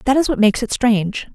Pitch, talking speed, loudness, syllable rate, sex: 235 Hz, 270 wpm, -17 LUFS, 6.2 syllables/s, female